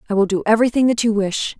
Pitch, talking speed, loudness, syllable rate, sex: 220 Hz, 265 wpm, -17 LUFS, 7.4 syllables/s, female